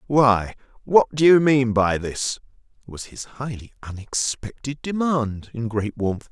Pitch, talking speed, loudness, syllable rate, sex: 125 Hz, 140 wpm, -21 LUFS, 3.8 syllables/s, male